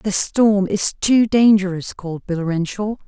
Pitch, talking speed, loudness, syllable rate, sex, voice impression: 200 Hz, 155 wpm, -17 LUFS, 4.1 syllables/s, female, feminine, very adult-like, slightly muffled, calm, slightly elegant